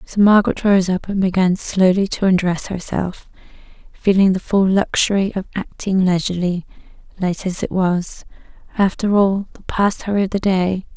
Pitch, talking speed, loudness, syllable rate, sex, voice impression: 190 Hz, 160 wpm, -18 LUFS, 4.9 syllables/s, female, feminine, adult-like, relaxed, weak, soft, calm, friendly, reassuring, elegant, kind, modest